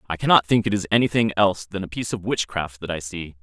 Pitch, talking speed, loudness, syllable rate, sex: 95 Hz, 265 wpm, -22 LUFS, 6.8 syllables/s, male